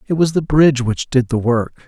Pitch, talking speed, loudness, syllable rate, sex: 135 Hz, 255 wpm, -16 LUFS, 5.1 syllables/s, male